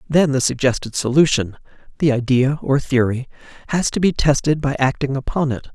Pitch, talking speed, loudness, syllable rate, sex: 135 Hz, 145 wpm, -18 LUFS, 5.4 syllables/s, male